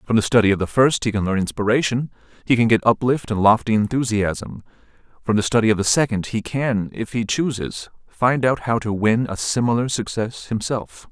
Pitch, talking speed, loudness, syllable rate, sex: 110 Hz, 200 wpm, -20 LUFS, 5.3 syllables/s, male